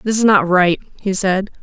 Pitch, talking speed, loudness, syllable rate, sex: 195 Hz, 220 wpm, -15 LUFS, 5.0 syllables/s, female